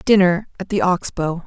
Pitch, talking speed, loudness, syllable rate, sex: 185 Hz, 205 wpm, -19 LUFS, 4.8 syllables/s, female